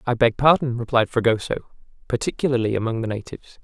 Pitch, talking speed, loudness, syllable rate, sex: 120 Hz, 150 wpm, -21 LUFS, 6.6 syllables/s, male